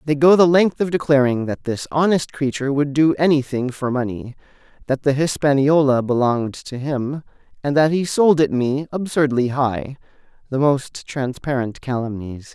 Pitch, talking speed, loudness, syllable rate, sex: 140 Hz, 155 wpm, -19 LUFS, 4.8 syllables/s, male